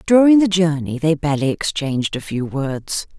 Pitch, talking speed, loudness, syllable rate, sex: 155 Hz, 170 wpm, -18 LUFS, 5.0 syllables/s, female